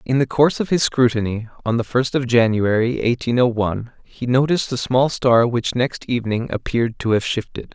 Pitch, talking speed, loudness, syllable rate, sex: 120 Hz, 200 wpm, -19 LUFS, 5.4 syllables/s, male